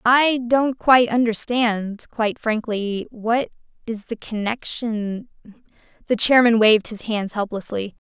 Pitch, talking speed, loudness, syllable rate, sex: 225 Hz, 120 wpm, -20 LUFS, 4.1 syllables/s, female